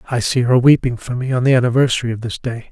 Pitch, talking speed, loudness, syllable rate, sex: 125 Hz, 265 wpm, -16 LUFS, 7.0 syllables/s, male